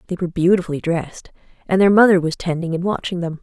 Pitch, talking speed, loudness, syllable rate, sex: 175 Hz, 210 wpm, -18 LUFS, 7.1 syllables/s, female